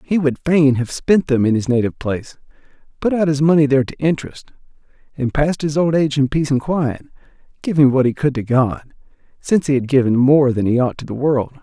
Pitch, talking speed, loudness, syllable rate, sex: 140 Hz, 220 wpm, -17 LUFS, 6.1 syllables/s, male